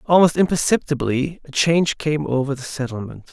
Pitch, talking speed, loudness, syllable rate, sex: 145 Hz, 145 wpm, -20 LUFS, 5.5 syllables/s, male